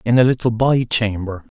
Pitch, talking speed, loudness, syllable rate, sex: 115 Hz, 190 wpm, -17 LUFS, 5.1 syllables/s, male